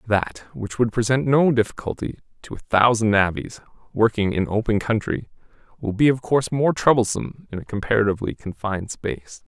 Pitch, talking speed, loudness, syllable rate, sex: 110 Hz, 155 wpm, -21 LUFS, 5.6 syllables/s, male